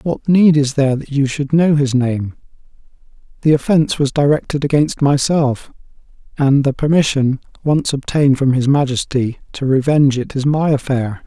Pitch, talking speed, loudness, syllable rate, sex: 140 Hz, 160 wpm, -15 LUFS, 5.1 syllables/s, male